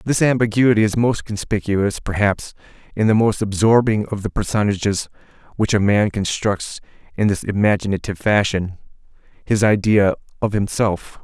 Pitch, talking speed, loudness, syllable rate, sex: 105 Hz, 130 wpm, -18 LUFS, 5.0 syllables/s, male